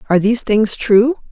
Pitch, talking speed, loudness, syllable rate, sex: 225 Hz, 185 wpm, -14 LUFS, 6.1 syllables/s, female